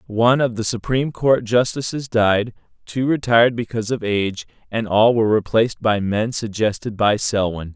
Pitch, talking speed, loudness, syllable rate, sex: 110 Hz, 160 wpm, -19 LUFS, 5.3 syllables/s, male